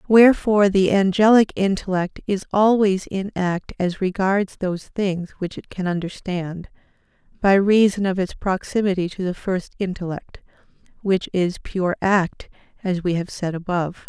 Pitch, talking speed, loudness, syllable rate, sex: 190 Hz, 145 wpm, -21 LUFS, 4.6 syllables/s, female